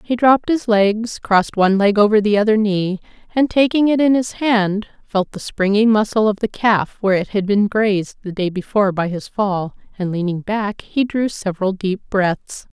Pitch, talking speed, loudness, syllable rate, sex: 210 Hz, 200 wpm, -17 LUFS, 5.0 syllables/s, female